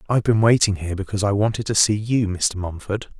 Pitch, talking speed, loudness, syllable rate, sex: 105 Hz, 225 wpm, -20 LUFS, 6.5 syllables/s, male